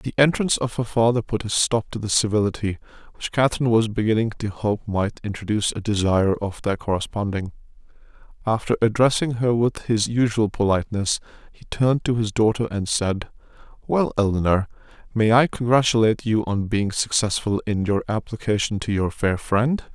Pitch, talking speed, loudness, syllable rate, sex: 110 Hz, 160 wpm, -22 LUFS, 5.5 syllables/s, male